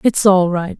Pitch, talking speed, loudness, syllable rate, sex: 185 Hz, 230 wpm, -14 LUFS, 4.4 syllables/s, female